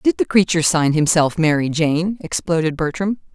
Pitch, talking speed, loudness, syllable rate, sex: 165 Hz, 160 wpm, -18 LUFS, 5.1 syllables/s, female